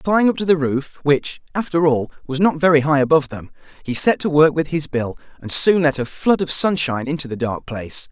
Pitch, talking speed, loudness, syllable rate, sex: 150 Hz, 230 wpm, -18 LUFS, 5.7 syllables/s, male